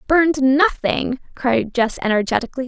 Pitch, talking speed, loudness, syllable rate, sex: 265 Hz, 110 wpm, -18 LUFS, 5.0 syllables/s, female